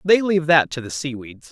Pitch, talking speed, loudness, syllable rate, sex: 155 Hz, 240 wpm, -19 LUFS, 5.7 syllables/s, male